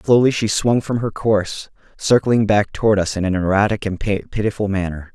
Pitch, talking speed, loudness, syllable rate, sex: 105 Hz, 185 wpm, -18 LUFS, 5.2 syllables/s, male